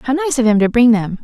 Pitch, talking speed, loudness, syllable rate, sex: 240 Hz, 340 wpm, -14 LUFS, 6.0 syllables/s, female